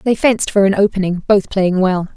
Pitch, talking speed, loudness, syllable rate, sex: 195 Hz, 220 wpm, -15 LUFS, 5.6 syllables/s, female